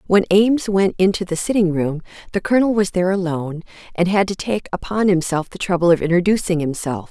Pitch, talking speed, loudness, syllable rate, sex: 185 Hz, 195 wpm, -18 LUFS, 6.2 syllables/s, female